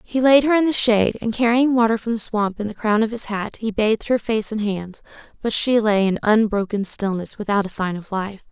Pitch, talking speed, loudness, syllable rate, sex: 215 Hz, 245 wpm, -20 LUFS, 5.4 syllables/s, female